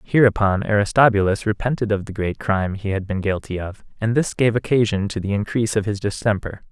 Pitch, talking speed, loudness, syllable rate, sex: 105 Hz, 195 wpm, -20 LUFS, 6.0 syllables/s, male